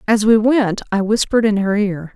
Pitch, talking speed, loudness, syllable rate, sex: 210 Hz, 225 wpm, -16 LUFS, 5.3 syllables/s, female